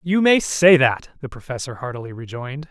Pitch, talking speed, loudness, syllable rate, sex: 140 Hz, 180 wpm, -18 LUFS, 5.6 syllables/s, male